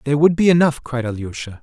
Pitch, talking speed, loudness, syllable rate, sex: 135 Hz, 220 wpm, -17 LUFS, 6.6 syllables/s, male